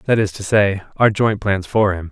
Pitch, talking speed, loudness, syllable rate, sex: 100 Hz, 255 wpm, -17 LUFS, 4.7 syllables/s, male